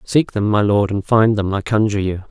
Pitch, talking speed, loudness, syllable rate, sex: 105 Hz, 260 wpm, -17 LUFS, 5.6 syllables/s, male